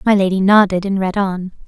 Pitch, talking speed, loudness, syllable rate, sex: 195 Hz, 215 wpm, -15 LUFS, 5.6 syllables/s, female